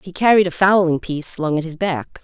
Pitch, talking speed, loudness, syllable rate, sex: 170 Hz, 240 wpm, -17 LUFS, 5.6 syllables/s, female